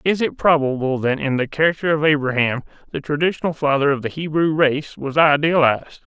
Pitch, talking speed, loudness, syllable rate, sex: 145 Hz, 175 wpm, -19 LUFS, 5.7 syllables/s, male